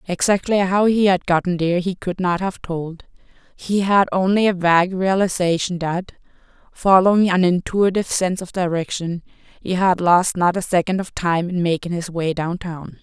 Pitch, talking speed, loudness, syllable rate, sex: 180 Hz, 170 wpm, -19 LUFS, 4.9 syllables/s, female